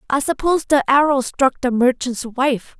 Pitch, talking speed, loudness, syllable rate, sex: 265 Hz, 170 wpm, -18 LUFS, 4.7 syllables/s, female